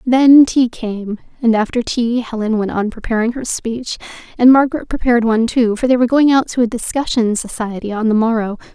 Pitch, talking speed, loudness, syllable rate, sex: 235 Hz, 200 wpm, -15 LUFS, 5.6 syllables/s, female